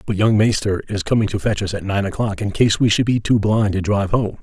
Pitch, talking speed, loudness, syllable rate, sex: 105 Hz, 285 wpm, -18 LUFS, 6.0 syllables/s, male